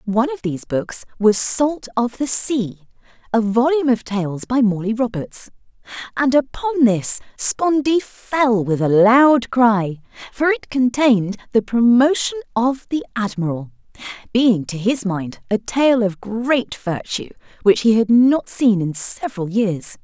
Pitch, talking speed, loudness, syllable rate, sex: 230 Hz, 150 wpm, -18 LUFS, 4.1 syllables/s, female